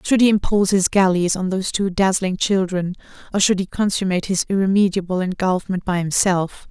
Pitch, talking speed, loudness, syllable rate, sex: 190 Hz, 170 wpm, -19 LUFS, 5.7 syllables/s, female